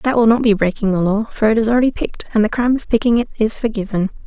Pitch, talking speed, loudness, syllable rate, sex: 220 Hz, 280 wpm, -17 LUFS, 7.2 syllables/s, female